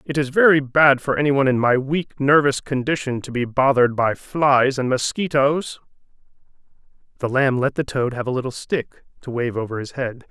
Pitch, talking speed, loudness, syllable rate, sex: 135 Hz, 190 wpm, -19 LUFS, 5.3 syllables/s, male